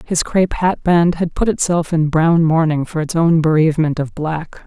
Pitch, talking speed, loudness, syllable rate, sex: 165 Hz, 205 wpm, -16 LUFS, 4.8 syllables/s, female